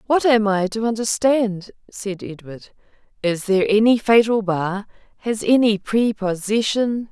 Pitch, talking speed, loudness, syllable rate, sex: 215 Hz, 125 wpm, -19 LUFS, 4.2 syllables/s, female